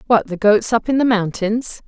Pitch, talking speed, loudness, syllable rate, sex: 220 Hz, 225 wpm, -17 LUFS, 4.8 syllables/s, female